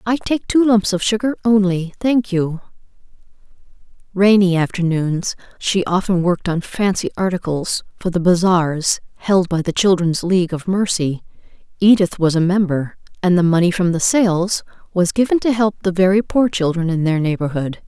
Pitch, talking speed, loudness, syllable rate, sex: 185 Hz, 160 wpm, -17 LUFS, 4.9 syllables/s, female